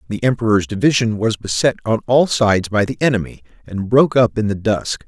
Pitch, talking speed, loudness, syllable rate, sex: 110 Hz, 200 wpm, -17 LUFS, 5.8 syllables/s, male